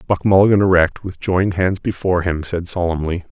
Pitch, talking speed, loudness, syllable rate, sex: 90 Hz, 175 wpm, -17 LUFS, 5.8 syllables/s, male